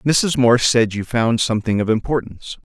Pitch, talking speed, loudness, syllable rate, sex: 120 Hz, 180 wpm, -17 LUFS, 5.4 syllables/s, male